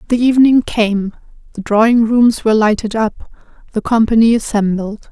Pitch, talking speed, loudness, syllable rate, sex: 220 Hz, 140 wpm, -13 LUFS, 5.2 syllables/s, female